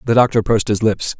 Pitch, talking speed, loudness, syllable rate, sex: 110 Hz, 250 wpm, -16 LUFS, 6.9 syllables/s, male